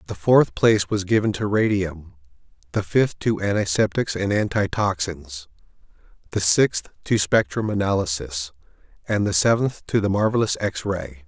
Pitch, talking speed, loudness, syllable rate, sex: 105 Hz, 140 wpm, -21 LUFS, 4.9 syllables/s, male